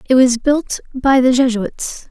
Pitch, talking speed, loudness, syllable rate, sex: 255 Hz, 170 wpm, -15 LUFS, 3.8 syllables/s, female